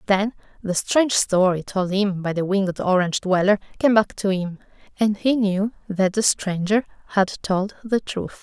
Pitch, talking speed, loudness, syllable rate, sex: 200 Hz, 180 wpm, -21 LUFS, 4.7 syllables/s, female